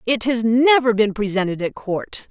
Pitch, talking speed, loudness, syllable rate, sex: 225 Hz, 180 wpm, -18 LUFS, 4.6 syllables/s, female